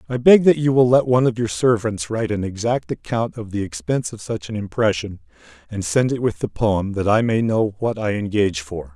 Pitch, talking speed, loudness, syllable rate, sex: 115 Hz, 235 wpm, -20 LUFS, 5.6 syllables/s, male